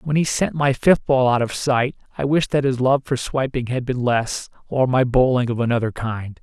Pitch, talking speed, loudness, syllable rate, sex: 130 Hz, 235 wpm, -20 LUFS, 4.9 syllables/s, male